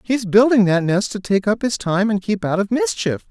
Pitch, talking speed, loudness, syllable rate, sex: 200 Hz, 255 wpm, -18 LUFS, 5.0 syllables/s, male